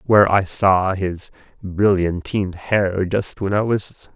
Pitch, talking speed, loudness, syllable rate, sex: 95 Hz, 145 wpm, -19 LUFS, 3.8 syllables/s, male